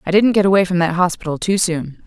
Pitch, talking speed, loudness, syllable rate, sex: 180 Hz, 260 wpm, -16 LUFS, 6.3 syllables/s, female